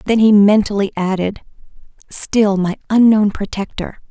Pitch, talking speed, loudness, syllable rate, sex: 205 Hz, 100 wpm, -15 LUFS, 4.5 syllables/s, female